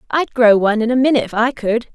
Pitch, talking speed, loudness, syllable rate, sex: 235 Hz, 280 wpm, -15 LUFS, 7.1 syllables/s, female